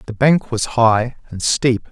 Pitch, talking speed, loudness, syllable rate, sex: 120 Hz, 190 wpm, -17 LUFS, 3.7 syllables/s, male